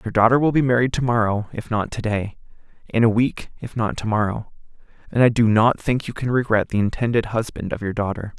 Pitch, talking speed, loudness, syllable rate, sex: 115 Hz, 220 wpm, -21 LUFS, 5.8 syllables/s, male